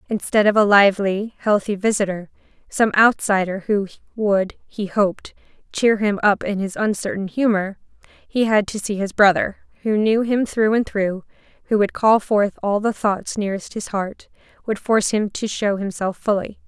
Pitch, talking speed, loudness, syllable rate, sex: 205 Hz, 175 wpm, -20 LUFS, 4.8 syllables/s, female